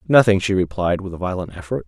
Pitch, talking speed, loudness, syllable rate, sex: 95 Hz, 225 wpm, -20 LUFS, 6.5 syllables/s, male